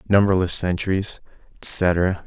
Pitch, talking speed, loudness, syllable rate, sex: 95 Hz, 80 wpm, -20 LUFS, 4.0 syllables/s, male